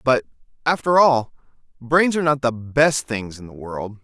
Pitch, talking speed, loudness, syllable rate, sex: 130 Hz, 180 wpm, -19 LUFS, 4.6 syllables/s, male